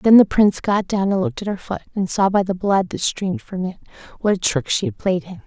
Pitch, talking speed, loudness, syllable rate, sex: 195 Hz, 285 wpm, -20 LUFS, 6.0 syllables/s, female